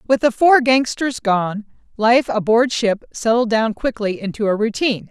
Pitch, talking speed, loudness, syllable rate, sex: 230 Hz, 155 wpm, -17 LUFS, 4.7 syllables/s, female